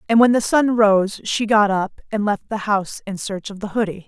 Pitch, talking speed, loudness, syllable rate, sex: 210 Hz, 250 wpm, -19 LUFS, 5.1 syllables/s, female